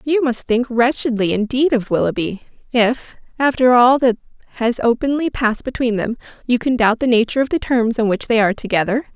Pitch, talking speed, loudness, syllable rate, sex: 240 Hz, 190 wpm, -17 LUFS, 5.7 syllables/s, female